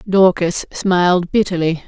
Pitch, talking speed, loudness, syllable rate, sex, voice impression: 180 Hz, 95 wpm, -16 LUFS, 4.2 syllables/s, female, very feminine, adult-like, slightly middle-aged, thin, slightly relaxed, slightly weak, slightly bright, soft, slightly muffled, fluent, slightly cute, intellectual, refreshing, very sincere, calm, very friendly, very reassuring, slightly unique, very elegant, sweet, slightly lively, very kind, modest